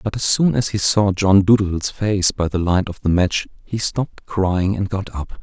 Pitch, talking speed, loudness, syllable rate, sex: 100 Hz, 230 wpm, -18 LUFS, 4.7 syllables/s, male